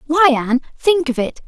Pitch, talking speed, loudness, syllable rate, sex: 290 Hz, 205 wpm, -16 LUFS, 5.4 syllables/s, female